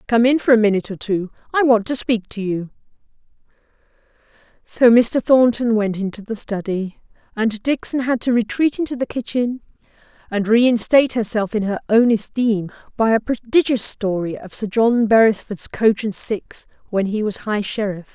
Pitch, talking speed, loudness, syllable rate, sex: 225 Hz, 170 wpm, -18 LUFS, 4.9 syllables/s, female